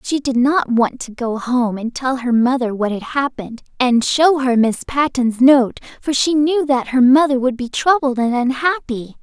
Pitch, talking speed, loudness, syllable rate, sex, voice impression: 260 Hz, 200 wpm, -16 LUFS, 4.5 syllables/s, female, very feminine, very young, very thin, tensed, slightly weak, very bright, soft, very clear, very fluent, slightly nasal, very cute, slightly intellectual, very refreshing, slightly sincere, slightly calm, very friendly, very reassuring, very unique, slightly elegant, slightly wild, very sweet, very lively, very kind, very sharp, very light